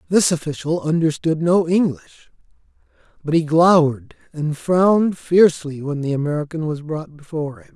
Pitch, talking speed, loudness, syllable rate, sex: 155 Hz, 140 wpm, -19 LUFS, 5.3 syllables/s, male